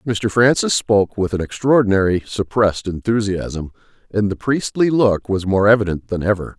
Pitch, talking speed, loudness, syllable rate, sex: 105 Hz, 155 wpm, -18 LUFS, 5.0 syllables/s, male